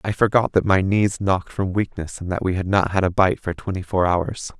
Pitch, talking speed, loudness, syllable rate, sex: 95 Hz, 260 wpm, -21 LUFS, 5.4 syllables/s, male